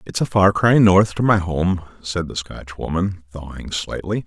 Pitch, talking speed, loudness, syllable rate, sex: 90 Hz, 185 wpm, -19 LUFS, 4.4 syllables/s, male